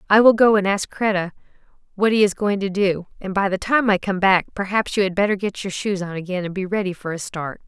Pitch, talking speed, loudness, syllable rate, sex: 195 Hz, 265 wpm, -20 LUFS, 5.9 syllables/s, female